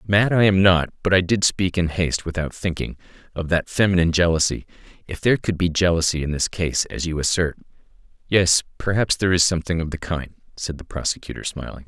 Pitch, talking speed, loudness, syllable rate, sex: 85 Hz, 195 wpm, -21 LUFS, 6.0 syllables/s, male